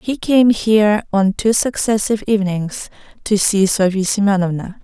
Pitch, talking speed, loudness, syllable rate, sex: 205 Hz, 135 wpm, -16 LUFS, 4.9 syllables/s, female